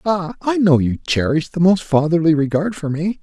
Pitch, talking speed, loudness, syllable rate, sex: 170 Hz, 185 wpm, -17 LUFS, 4.5 syllables/s, male